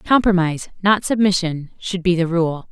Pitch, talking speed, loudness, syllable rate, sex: 180 Hz, 155 wpm, -18 LUFS, 5.0 syllables/s, female